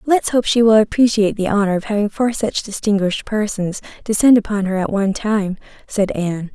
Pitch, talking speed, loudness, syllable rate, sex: 210 Hz, 195 wpm, -17 LUFS, 5.7 syllables/s, female